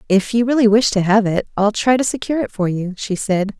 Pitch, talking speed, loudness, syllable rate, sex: 215 Hz, 265 wpm, -17 LUFS, 5.8 syllables/s, female